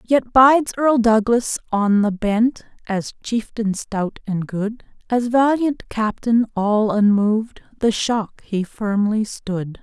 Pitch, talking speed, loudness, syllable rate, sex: 220 Hz, 135 wpm, -19 LUFS, 3.4 syllables/s, female